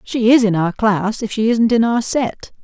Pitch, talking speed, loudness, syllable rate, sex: 220 Hz, 250 wpm, -16 LUFS, 4.5 syllables/s, female